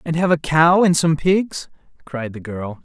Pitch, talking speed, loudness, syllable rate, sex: 155 Hz, 210 wpm, -18 LUFS, 4.2 syllables/s, male